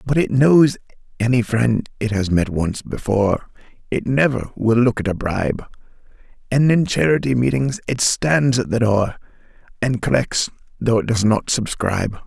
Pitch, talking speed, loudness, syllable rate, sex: 120 Hz, 155 wpm, -19 LUFS, 4.6 syllables/s, male